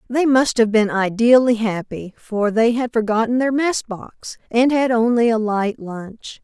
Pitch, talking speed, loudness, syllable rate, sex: 230 Hz, 175 wpm, -18 LUFS, 4.1 syllables/s, female